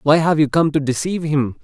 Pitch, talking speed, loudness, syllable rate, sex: 150 Hz, 255 wpm, -17 LUFS, 6.0 syllables/s, male